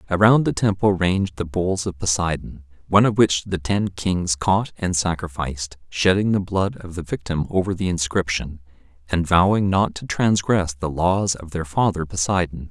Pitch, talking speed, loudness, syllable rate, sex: 90 Hz, 175 wpm, -21 LUFS, 4.8 syllables/s, male